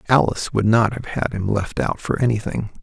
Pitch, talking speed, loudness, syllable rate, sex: 110 Hz, 210 wpm, -21 LUFS, 5.5 syllables/s, male